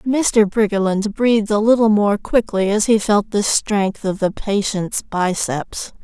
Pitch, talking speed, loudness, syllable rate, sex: 205 Hz, 160 wpm, -17 LUFS, 3.9 syllables/s, female